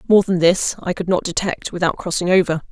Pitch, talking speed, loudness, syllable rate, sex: 180 Hz, 220 wpm, -18 LUFS, 5.7 syllables/s, female